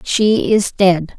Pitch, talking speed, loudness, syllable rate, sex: 195 Hz, 150 wpm, -14 LUFS, 2.9 syllables/s, female